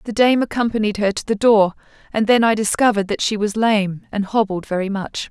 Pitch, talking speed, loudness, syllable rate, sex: 210 Hz, 215 wpm, -18 LUFS, 5.7 syllables/s, female